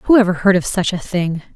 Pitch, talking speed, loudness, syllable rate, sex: 190 Hz, 270 wpm, -16 LUFS, 5.7 syllables/s, female